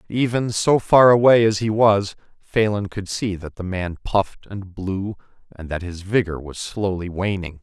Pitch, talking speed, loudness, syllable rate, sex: 100 Hz, 180 wpm, -20 LUFS, 4.5 syllables/s, male